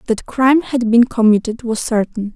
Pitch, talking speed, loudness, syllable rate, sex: 235 Hz, 180 wpm, -15 LUFS, 5.1 syllables/s, female